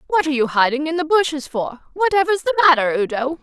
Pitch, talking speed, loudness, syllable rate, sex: 300 Hz, 210 wpm, -18 LUFS, 6.5 syllables/s, female